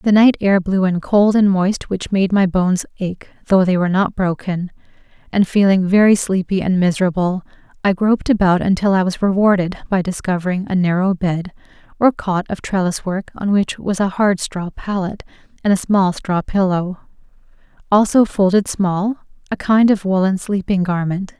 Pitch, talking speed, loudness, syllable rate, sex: 190 Hz, 175 wpm, -17 LUFS, 5.0 syllables/s, female